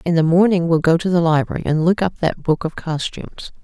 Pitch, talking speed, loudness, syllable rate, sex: 165 Hz, 245 wpm, -18 LUFS, 5.8 syllables/s, female